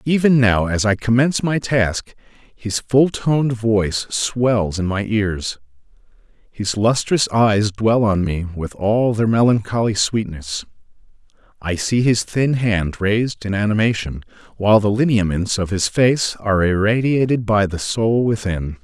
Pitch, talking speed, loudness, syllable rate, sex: 110 Hz, 145 wpm, -18 LUFS, 4.3 syllables/s, male